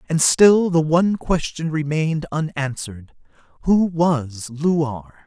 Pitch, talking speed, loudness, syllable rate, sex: 155 Hz, 115 wpm, -19 LUFS, 4.0 syllables/s, male